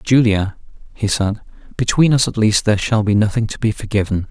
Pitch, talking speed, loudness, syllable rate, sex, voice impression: 110 Hz, 195 wpm, -17 LUFS, 5.7 syllables/s, male, masculine, adult-like, slightly thick, cool, sincere, slightly friendly